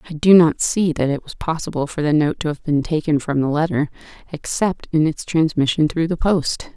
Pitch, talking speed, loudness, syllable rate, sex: 155 Hz, 220 wpm, -19 LUFS, 5.3 syllables/s, female